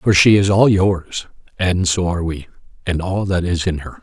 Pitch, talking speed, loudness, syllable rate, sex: 90 Hz, 225 wpm, -17 LUFS, 4.8 syllables/s, male